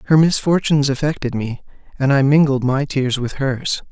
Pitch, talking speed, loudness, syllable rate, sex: 140 Hz, 170 wpm, -17 LUFS, 5.1 syllables/s, male